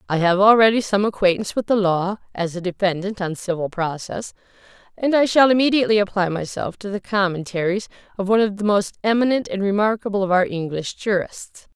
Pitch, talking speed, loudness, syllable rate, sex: 200 Hz, 170 wpm, -20 LUFS, 5.9 syllables/s, female